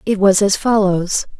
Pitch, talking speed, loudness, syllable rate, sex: 200 Hz, 170 wpm, -15 LUFS, 4.2 syllables/s, female